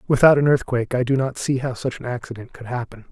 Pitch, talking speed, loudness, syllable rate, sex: 125 Hz, 250 wpm, -21 LUFS, 6.5 syllables/s, male